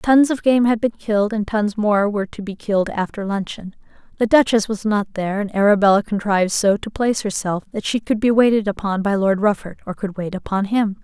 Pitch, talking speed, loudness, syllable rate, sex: 210 Hz, 225 wpm, -19 LUFS, 5.7 syllables/s, female